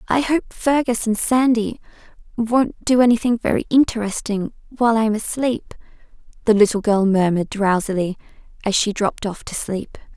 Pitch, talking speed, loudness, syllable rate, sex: 220 Hz, 150 wpm, -19 LUFS, 5.2 syllables/s, female